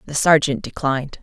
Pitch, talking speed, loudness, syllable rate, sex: 145 Hz, 145 wpm, -18 LUFS, 5.7 syllables/s, female